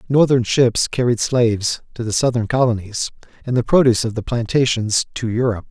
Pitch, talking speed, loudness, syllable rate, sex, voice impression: 120 Hz, 170 wpm, -18 LUFS, 5.6 syllables/s, male, masculine, adult-like, tensed, slightly powerful, clear, fluent, cool, sincere, calm, slightly mature, wild, slightly lively, slightly kind